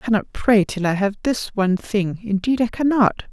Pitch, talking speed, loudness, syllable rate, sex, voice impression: 210 Hz, 215 wpm, -20 LUFS, 5.2 syllables/s, female, feminine, adult-like, relaxed, weak, soft, slightly muffled, intellectual, calm, slightly friendly, reassuring, slightly kind, slightly modest